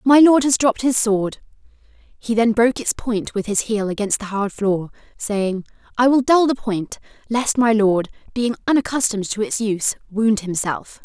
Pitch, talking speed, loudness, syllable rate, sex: 220 Hz, 185 wpm, -19 LUFS, 4.8 syllables/s, female